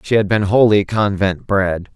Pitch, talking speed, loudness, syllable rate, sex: 100 Hz, 185 wpm, -16 LUFS, 4.4 syllables/s, male